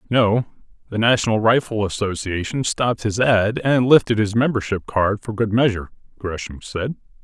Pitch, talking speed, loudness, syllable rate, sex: 110 Hz, 150 wpm, -20 LUFS, 5.2 syllables/s, male